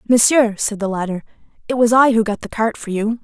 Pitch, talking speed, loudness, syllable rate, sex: 220 Hz, 240 wpm, -17 LUFS, 5.9 syllables/s, female